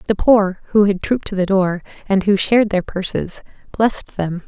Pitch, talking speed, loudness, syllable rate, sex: 195 Hz, 200 wpm, -17 LUFS, 5.2 syllables/s, female